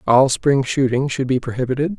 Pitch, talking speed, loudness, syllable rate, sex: 135 Hz, 180 wpm, -18 LUFS, 5.4 syllables/s, male